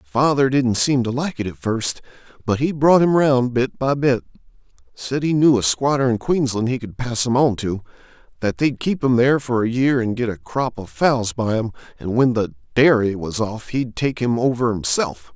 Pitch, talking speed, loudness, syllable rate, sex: 120 Hz, 215 wpm, -19 LUFS, 4.9 syllables/s, male